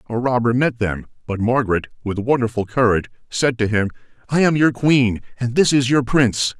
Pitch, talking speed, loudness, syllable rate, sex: 120 Hz, 190 wpm, -19 LUFS, 5.6 syllables/s, male